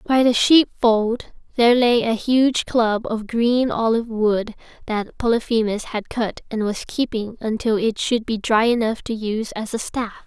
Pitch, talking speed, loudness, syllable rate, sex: 230 Hz, 175 wpm, -20 LUFS, 4.5 syllables/s, female